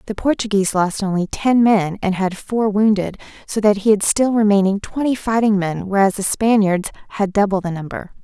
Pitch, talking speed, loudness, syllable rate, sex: 205 Hz, 190 wpm, -17 LUFS, 5.3 syllables/s, female